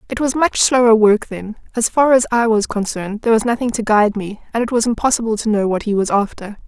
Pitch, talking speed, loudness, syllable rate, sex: 225 Hz, 250 wpm, -16 LUFS, 6.2 syllables/s, female